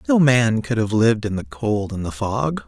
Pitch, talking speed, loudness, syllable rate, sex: 110 Hz, 245 wpm, -20 LUFS, 4.8 syllables/s, male